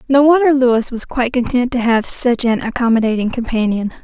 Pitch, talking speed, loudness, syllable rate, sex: 245 Hz, 180 wpm, -15 LUFS, 5.6 syllables/s, female